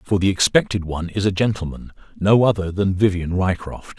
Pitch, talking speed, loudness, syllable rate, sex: 95 Hz, 180 wpm, -20 LUFS, 5.5 syllables/s, male